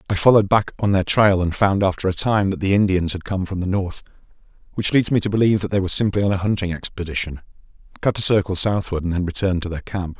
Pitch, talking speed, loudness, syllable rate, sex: 95 Hz, 245 wpm, -20 LUFS, 6.7 syllables/s, male